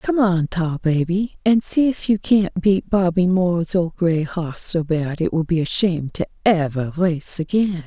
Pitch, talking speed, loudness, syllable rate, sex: 175 Hz, 185 wpm, -20 LUFS, 4.4 syllables/s, female